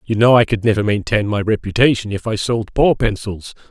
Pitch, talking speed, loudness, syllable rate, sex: 110 Hz, 210 wpm, -16 LUFS, 5.5 syllables/s, male